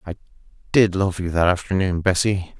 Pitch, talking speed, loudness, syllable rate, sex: 95 Hz, 160 wpm, -20 LUFS, 5.3 syllables/s, male